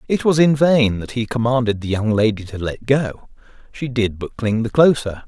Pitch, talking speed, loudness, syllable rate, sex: 120 Hz, 215 wpm, -18 LUFS, 4.9 syllables/s, male